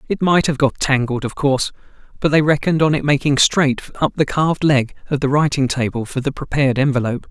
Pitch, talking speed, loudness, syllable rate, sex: 140 Hz, 215 wpm, -17 LUFS, 6.1 syllables/s, male